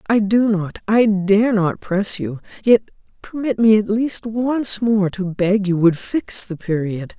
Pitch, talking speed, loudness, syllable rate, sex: 205 Hz, 175 wpm, -18 LUFS, 3.8 syllables/s, female